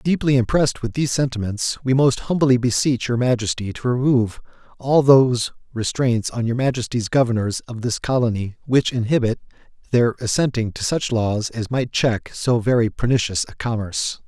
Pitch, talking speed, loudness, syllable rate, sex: 120 Hz, 160 wpm, -20 LUFS, 5.3 syllables/s, male